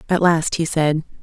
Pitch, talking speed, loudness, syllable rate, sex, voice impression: 165 Hz, 195 wpm, -18 LUFS, 4.6 syllables/s, female, feminine, adult-like, weak, slightly hard, fluent, slightly raspy, intellectual, calm, sharp